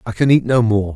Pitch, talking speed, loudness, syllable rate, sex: 115 Hz, 315 wpm, -15 LUFS, 6.0 syllables/s, male